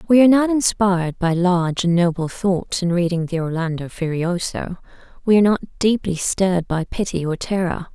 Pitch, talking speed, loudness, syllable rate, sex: 180 Hz, 175 wpm, -19 LUFS, 5.4 syllables/s, female